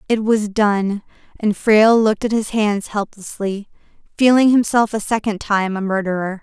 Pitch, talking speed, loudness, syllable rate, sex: 210 Hz, 160 wpm, -17 LUFS, 4.8 syllables/s, female